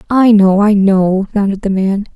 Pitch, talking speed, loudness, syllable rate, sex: 200 Hz, 195 wpm, -12 LUFS, 4.4 syllables/s, female